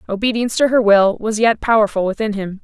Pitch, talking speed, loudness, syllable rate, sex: 215 Hz, 205 wpm, -16 LUFS, 6.2 syllables/s, female